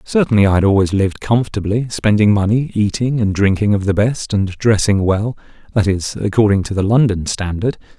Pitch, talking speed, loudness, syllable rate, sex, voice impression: 105 Hz, 175 wpm, -16 LUFS, 5.5 syllables/s, male, masculine, adult-like, relaxed, soft, muffled, slightly raspy, cool, intellectual, sincere, friendly, lively, kind, slightly modest